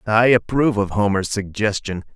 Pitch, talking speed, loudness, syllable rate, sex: 105 Hz, 140 wpm, -19 LUFS, 5.2 syllables/s, male